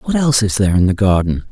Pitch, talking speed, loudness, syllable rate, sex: 105 Hz, 275 wpm, -14 LUFS, 6.9 syllables/s, male